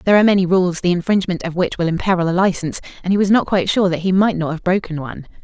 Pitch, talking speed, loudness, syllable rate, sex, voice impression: 180 Hz, 275 wpm, -17 LUFS, 7.7 syllables/s, female, feminine, adult-like, tensed, powerful, hard, clear, fluent, intellectual, elegant, lively, intense, sharp